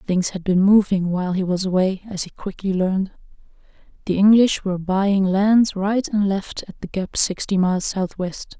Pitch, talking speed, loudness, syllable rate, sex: 190 Hz, 180 wpm, -20 LUFS, 4.8 syllables/s, female